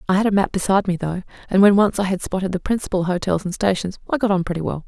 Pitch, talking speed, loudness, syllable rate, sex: 190 Hz, 285 wpm, -20 LUFS, 7.1 syllables/s, female